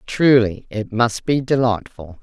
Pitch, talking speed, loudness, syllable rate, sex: 115 Hz, 135 wpm, -18 LUFS, 3.9 syllables/s, female